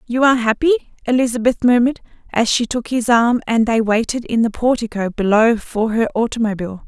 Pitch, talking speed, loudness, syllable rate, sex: 235 Hz, 175 wpm, -17 LUFS, 5.9 syllables/s, female